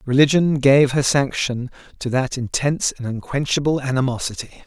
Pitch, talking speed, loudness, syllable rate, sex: 135 Hz, 130 wpm, -19 LUFS, 5.4 syllables/s, male